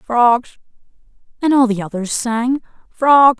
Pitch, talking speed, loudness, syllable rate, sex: 245 Hz, 125 wpm, -16 LUFS, 3.7 syllables/s, female